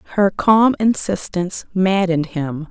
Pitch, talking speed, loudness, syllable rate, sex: 185 Hz, 110 wpm, -17 LUFS, 4.4 syllables/s, female